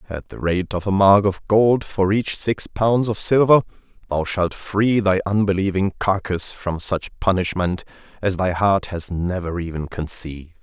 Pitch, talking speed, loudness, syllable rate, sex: 95 Hz, 170 wpm, -20 LUFS, 4.4 syllables/s, male